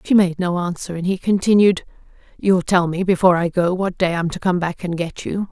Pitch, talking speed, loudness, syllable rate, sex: 180 Hz, 240 wpm, -19 LUFS, 5.5 syllables/s, female